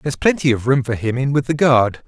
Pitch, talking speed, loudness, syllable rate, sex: 130 Hz, 290 wpm, -17 LUFS, 5.9 syllables/s, male